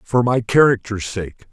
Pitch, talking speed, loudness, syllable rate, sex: 110 Hz, 160 wpm, -17 LUFS, 4.3 syllables/s, male